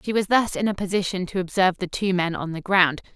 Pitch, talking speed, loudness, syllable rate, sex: 185 Hz, 265 wpm, -22 LUFS, 6.1 syllables/s, female